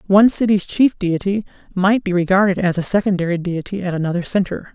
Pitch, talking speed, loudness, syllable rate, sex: 190 Hz, 175 wpm, -17 LUFS, 6.0 syllables/s, female